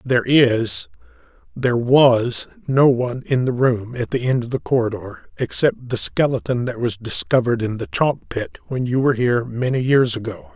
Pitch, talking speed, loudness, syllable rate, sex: 125 Hz, 170 wpm, -19 LUFS, 5.1 syllables/s, male